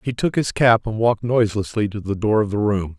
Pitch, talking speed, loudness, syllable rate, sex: 110 Hz, 260 wpm, -20 LUFS, 5.9 syllables/s, male